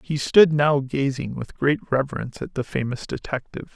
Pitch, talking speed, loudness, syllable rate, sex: 140 Hz, 175 wpm, -22 LUFS, 5.2 syllables/s, male